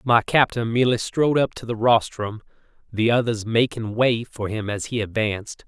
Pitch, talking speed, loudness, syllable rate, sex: 115 Hz, 180 wpm, -22 LUFS, 5.1 syllables/s, male